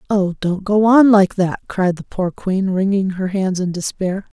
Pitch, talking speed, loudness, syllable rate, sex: 190 Hz, 205 wpm, -17 LUFS, 4.2 syllables/s, female